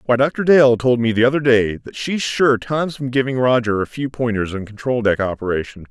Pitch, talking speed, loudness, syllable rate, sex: 125 Hz, 225 wpm, -18 LUFS, 5.2 syllables/s, male